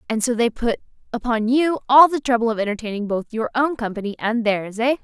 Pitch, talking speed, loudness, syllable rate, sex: 235 Hz, 215 wpm, -20 LUFS, 5.9 syllables/s, female